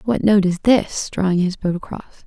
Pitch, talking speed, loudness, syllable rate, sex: 195 Hz, 210 wpm, -18 LUFS, 5.4 syllables/s, female